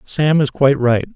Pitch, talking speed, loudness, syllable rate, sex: 145 Hz, 210 wpm, -15 LUFS, 5.2 syllables/s, male